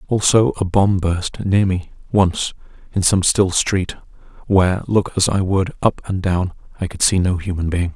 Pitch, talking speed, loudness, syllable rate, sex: 95 Hz, 190 wpm, -18 LUFS, 4.5 syllables/s, male